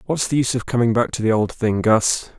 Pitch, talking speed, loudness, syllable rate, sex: 115 Hz, 275 wpm, -19 LUFS, 5.9 syllables/s, male